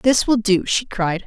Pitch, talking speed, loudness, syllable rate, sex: 210 Hz, 240 wpm, -18 LUFS, 4.1 syllables/s, female